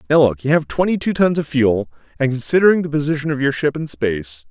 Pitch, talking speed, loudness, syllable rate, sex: 140 Hz, 215 wpm, -18 LUFS, 6.3 syllables/s, male